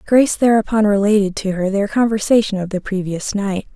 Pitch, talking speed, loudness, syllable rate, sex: 205 Hz, 175 wpm, -17 LUFS, 5.6 syllables/s, female